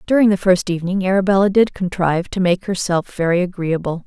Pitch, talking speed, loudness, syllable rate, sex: 185 Hz, 175 wpm, -17 LUFS, 6.1 syllables/s, female